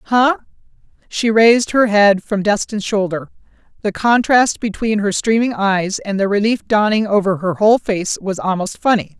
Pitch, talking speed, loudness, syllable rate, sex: 210 Hz, 165 wpm, -16 LUFS, 4.8 syllables/s, female